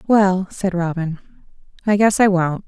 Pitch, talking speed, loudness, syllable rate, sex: 185 Hz, 155 wpm, -18 LUFS, 4.3 syllables/s, female